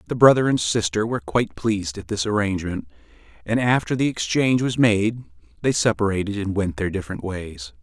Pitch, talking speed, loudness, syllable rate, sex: 105 Hz, 175 wpm, -22 LUFS, 5.9 syllables/s, male